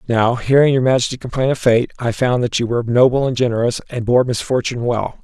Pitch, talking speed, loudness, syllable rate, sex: 125 Hz, 220 wpm, -17 LUFS, 6.1 syllables/s, male